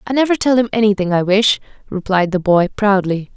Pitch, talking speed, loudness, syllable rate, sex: 205 Hz, 195 wpm, -15 LUFS, 5.7 syllables/s, female